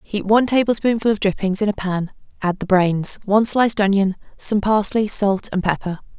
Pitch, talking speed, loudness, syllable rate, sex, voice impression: 200 Hz, 185 wpm, -19 LUFS, 5.4 syllables/s, female, feminine, adult-like, slightly tensed, slightly dark, soft, clear, fluent, intellectual, calm, friendly, reassuring, elegant, lively, slightly sharp